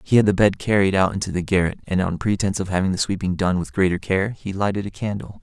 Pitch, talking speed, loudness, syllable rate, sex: 95 Hz, 265 wpm, -21 LUFS, 6.5 syllables/s, male